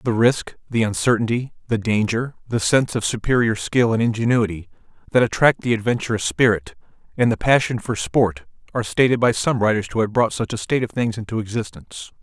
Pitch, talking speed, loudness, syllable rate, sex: 115 Hz, 185 wpm, -20 LUFS, 5.9 syllables/s, male